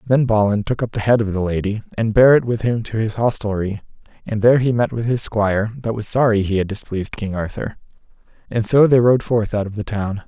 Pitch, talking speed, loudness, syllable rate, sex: 110 Hz, 240 wpm, -18 LUFS, 5.8 syllables/s, male